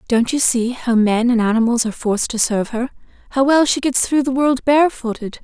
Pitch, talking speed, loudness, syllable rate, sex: 245 Hz, 220 wpm, -17 LUFS, 5.8 syllables/s, female